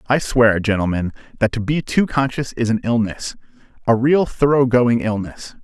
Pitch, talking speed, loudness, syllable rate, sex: 120 Hz, 160 wpm, -18 LUFS, 4.8 syllables/s, male